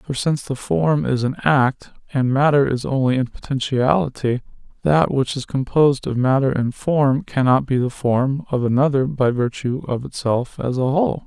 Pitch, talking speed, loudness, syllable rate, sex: 135 Hz, 180 wpm, -19 LUFS, 4.8 syllables/s, male